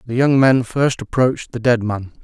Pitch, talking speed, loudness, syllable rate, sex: 125 Hz, 215 wpm, -17 LUFS, 5.0 syllables/s, male